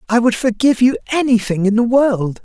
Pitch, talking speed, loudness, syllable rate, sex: 235 Hz, 195 wpm, -15 LUFS, 5.6 syllables/s, male